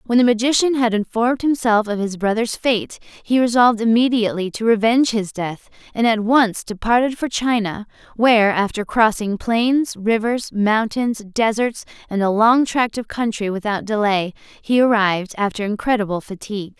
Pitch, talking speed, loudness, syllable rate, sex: 220 Hz, 155 wpm, -18 LUFS, 4.9 syllables/s, female